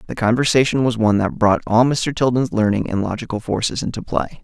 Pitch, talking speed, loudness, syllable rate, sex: 115 Hz, 205 wpm, -18 LUFS, 5.9 syllables/s, male